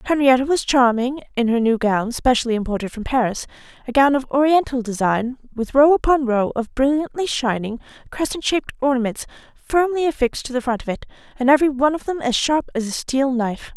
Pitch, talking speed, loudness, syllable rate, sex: 260 Hz, 190 wpm, -19 LUFS, 6.0 syllables/s, female